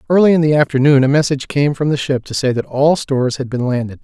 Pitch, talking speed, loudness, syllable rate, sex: 140 Hz, 270 wpm, -15 LUFS, 6.5 syllables/s, male